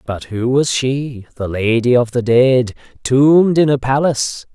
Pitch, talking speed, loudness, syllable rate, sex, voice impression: 125 Hz, 170 wpm, -15 LUFS, 4.3 syllables/s, male, masculine, adult-like, slightly clear, cool, slightly intellectual, slightly refreshing